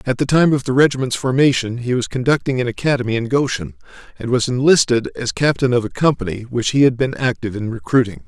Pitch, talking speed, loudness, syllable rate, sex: 125 Hz, 210 wpm, -17 LUFS, 6.3 syllables/s, male